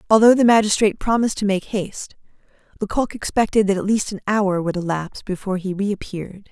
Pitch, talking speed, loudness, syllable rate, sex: 200 Hz, 175 wpm, -20 LUFS, 6.3 syllables/s, female